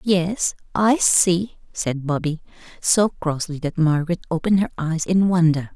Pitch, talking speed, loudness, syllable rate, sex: 170 Hz, 145 wpm, -20 LUFS, 4.5 syllables/s, female